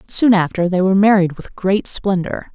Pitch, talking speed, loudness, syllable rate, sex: 190 Hz, 190 wpm, -16 LUFS, 5.0 syllables/s, female